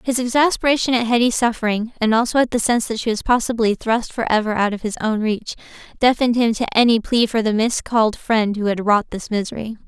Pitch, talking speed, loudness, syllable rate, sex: 225 Hz, 205 wpm, -18 LUFS, 6.1 syllables/s, female